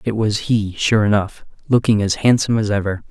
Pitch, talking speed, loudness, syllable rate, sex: 105 Hz, 195 wpm, -17 LUFS, 5.5 syllables/s, male